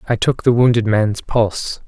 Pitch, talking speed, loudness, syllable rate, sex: 115 Hz, 190 wpm, -16 LUFS, 4.8 syllables/s, male